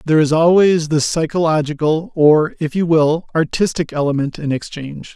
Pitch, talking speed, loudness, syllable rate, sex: 155 Hz, 150 wpm, -16 LUFS, 5.2 syllables/s, male